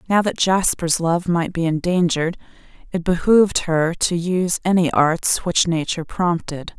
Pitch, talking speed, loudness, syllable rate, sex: 175 Hz, 150 wpm, -19 LUFS, 4.6 syllables/s, female